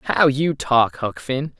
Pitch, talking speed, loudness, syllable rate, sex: 140 Hz, 190 wpm, -20 LUFS, 3.3 syllables/s, male